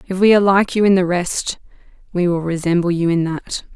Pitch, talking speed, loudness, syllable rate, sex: 180 Hz, 225 wpm, -17 LUFS, 5.7 syllables/s, female